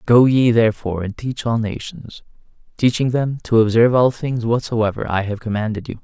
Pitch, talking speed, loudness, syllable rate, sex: 115 Hz, 180 wpm, -18 LUFS, 5.5 syllables/s, male